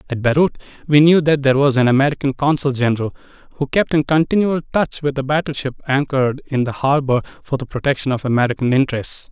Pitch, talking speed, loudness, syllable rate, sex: 140 Hz, 185 wpm, -17 LUFS, 6.5 syllables/s, male